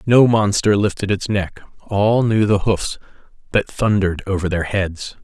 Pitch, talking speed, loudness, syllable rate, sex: 100 Hz, 160 wpm, -18 LUFS, 4.4 syllables/s, male